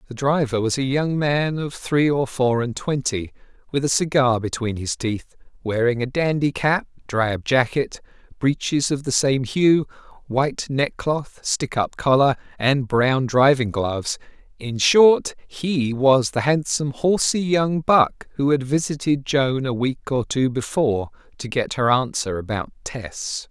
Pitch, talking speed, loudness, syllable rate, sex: 135 Hz, 155 wpm, -21 LUFS, 4.1 syllables/s, male